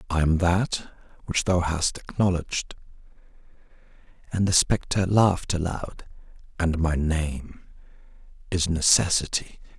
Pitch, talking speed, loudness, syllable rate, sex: 85 Hz, 100 wpm, -24 LUFS, 4.2 syllables/s, male